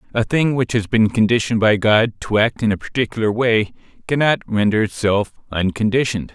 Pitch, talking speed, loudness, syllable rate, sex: 110 Hz, 170 wpm, -18 LUFS, 5.5 syllables/s, male